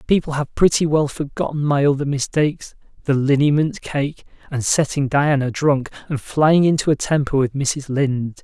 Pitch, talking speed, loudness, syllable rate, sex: 140 Hz, 155 wpm, -19 LUFS, 4.9 syllables/s, male